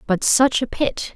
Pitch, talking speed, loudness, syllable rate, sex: 240 Hz, 210 wpm, -18 LUFS, 4.0 syllables/s, female